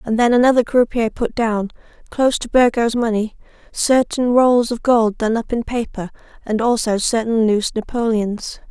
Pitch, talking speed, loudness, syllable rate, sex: 230 Hz, 160 wpm, -17 LUFS, 4.8 syllables/s, female